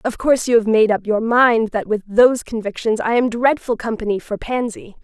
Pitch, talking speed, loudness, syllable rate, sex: 230 Hz, 190 wpm, -17 LUFS, 5.1 syllables/s, female